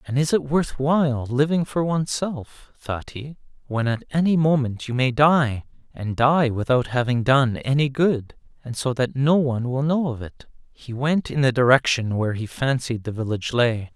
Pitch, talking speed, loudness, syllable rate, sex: 135 Hz, 190 wpm, -21 LUFS, 4.8 syllables/s, male